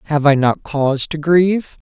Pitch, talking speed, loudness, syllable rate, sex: 155 Hz, 185 wpm, -16 LUFS, 5.0 syllables/s, male